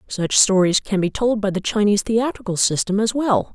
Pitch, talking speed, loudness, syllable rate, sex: 205 Hz, 205 wpm, -19 LUFS, 5.3 syllables/s, female